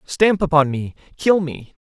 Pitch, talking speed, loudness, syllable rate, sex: 160 Hz, 165 wpm, -18 LUFS, 4.1 syllables/s, male